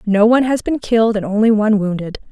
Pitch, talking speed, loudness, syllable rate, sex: 215 Hz, 235 wpm, -15 LUFS, 6.7 syllables/s, female